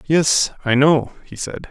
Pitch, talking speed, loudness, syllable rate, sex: 145 Hz, 175 wpm, -17 LUFS, 3.9 syllables/s, male